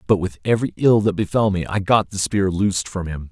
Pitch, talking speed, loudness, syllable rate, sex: 100 Hz, 255 wpm, -20 LUFS, 5.8 syllables/s, male